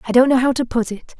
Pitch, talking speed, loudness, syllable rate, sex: 245 Hz, 355 wpm, -17 LUFS, 6.9 syllables/s, female